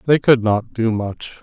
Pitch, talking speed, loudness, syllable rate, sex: 115 Hz, 210 wpm, -18 LUFS, 4.0 syllables/s, male